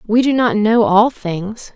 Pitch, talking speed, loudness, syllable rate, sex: 215 Hz, 205 wpm, -15 LUFS, 3.6 syllables/s, female